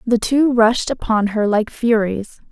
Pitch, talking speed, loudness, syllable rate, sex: 225 Hz, 165 wpm, -17 LUFS, 3.9 syllables/s, female